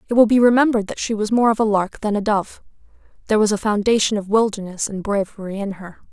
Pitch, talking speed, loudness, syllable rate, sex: 210 Hz, 235 wpm, -19 LUFS, 6.3 syllables/s, female